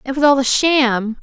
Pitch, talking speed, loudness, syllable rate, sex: 265 Hz, 245 wpm, -15 LUFS, 4.5 syllables/s, female